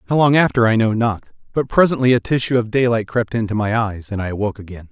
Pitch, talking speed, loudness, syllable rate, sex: 115 Hz, 245 wpm, -18 LUFS, 6.6 syllables/s, male